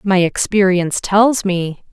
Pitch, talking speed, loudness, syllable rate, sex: 195 Hz, 125 wpm, -15 LUFS, 4.0 syllables/s, female